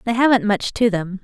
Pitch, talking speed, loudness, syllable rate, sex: 215 Hz, 245 wpm, -18 LUFS, 5.4 syllables/s, female